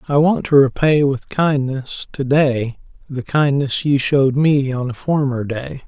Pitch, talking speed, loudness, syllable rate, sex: 140 Hz, 175 wpm, -17 LUFS, 4.1 syllables/s, male